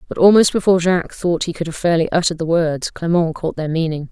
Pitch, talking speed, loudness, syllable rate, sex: 170 Hz, 235 wpm, -17 LUFS, 6.4 syllables/s, female